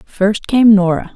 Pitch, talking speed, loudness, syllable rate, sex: 205 Hz, 155 wpm, -13 LUFS, 3.8 syllables/s, female